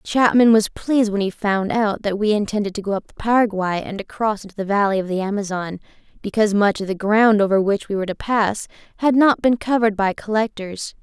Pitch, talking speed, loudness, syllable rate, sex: 210 Hz, 220 wpm, -19 LUFS, 5.9 syllables/s, female